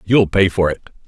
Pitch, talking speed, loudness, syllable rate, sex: 95 Hz, 220 wpm, -16 LUFS, 5.5 syllables/s, male